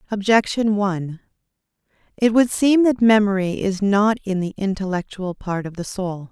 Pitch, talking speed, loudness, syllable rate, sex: 200 Hz, 150 wpm, -19 LUFS, 4.7 syllables/s, female